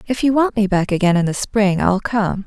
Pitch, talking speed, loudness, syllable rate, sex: 205 Hz, 270 wpm, -17 LUFS, 5.2 syllables/s, female